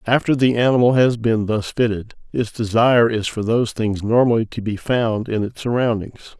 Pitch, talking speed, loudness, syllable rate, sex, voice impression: 115 Hz, 190 wpm, -19 LUFS, 5.3 syllables/s, male, masculine, middle-aged, thick, relaxed, slightly dark, slightly hard, raspy, calm, mature, wild, slightly strict, modest